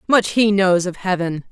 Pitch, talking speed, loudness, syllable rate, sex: 190 Hz, 200 wpm, -17 LUFS, 4.7 syllables/s, female